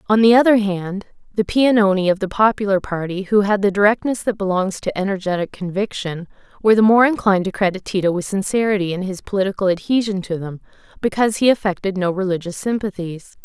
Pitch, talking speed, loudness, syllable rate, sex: 200 Hz, 180 wpm, -18 LUFS, 6.2 syllables/s, female